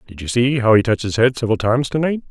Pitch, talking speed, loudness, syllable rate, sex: 120 Hz, 315 wpm, -17 LUFS, 7.6 syllables/s, male